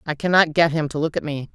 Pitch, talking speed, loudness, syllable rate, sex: 155 Hz, 310 wpm, -20 LUFS, 6.4 syllables/s, female